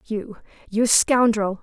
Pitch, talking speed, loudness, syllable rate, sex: 220 Hz, 110 wpm, -20 LUFS, 3.2 syllables/s, female